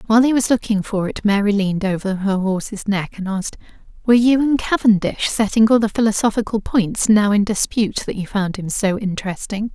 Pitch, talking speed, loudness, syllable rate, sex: 210 Hz, 195 wpm, -18 LUFS, 5.7 syllables/s, female